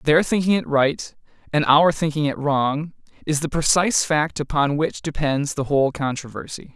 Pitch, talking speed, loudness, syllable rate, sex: 150 Hz, 170 wpm, -20 LUFS, 4.8 syllables/s, male